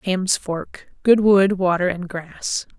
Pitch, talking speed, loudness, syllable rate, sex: 185 Hz, 130 wpm, -20 LUFS, 3.3 syllables/s, female